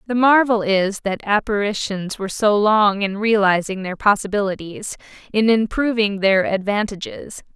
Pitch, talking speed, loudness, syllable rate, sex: 205 Hz, 125 wpm, -18 LUFS, 4.6 syllables/s, female